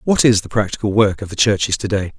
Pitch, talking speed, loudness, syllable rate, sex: 105 Hz, 275 wpm, -17 LUFS, 6.3 syllables/s, male